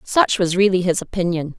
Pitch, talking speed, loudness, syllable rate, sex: 185 Hz, 190 wpm, -18 LUFS, 5.4 syllables/s, female